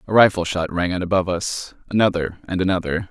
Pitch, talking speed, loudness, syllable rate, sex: 90 Hz, 195 wpm, -20 LUFS, 6.1 syllables/s, male